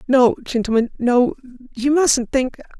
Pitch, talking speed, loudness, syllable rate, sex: 255 Hz, 130 wpm, -18 LUFS, 4.1 syllables/s, female